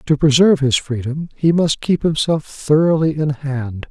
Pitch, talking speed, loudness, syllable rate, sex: 150 Hz, 170 wpm, -17 LUFS, 4.5 syllables/s, male